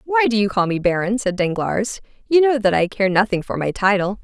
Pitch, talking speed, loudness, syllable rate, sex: 205 Hz, 240 wpm, -19 LUFS, 5.5 syllables/s, female